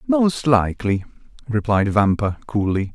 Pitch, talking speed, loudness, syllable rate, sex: 115 Hz, 100 wpm, -20 LUFS, 4.3 syllables/s, male